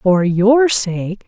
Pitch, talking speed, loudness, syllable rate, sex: 205 Hz, 140 wpm, -14 LUFS, 2.4 syllables/s, female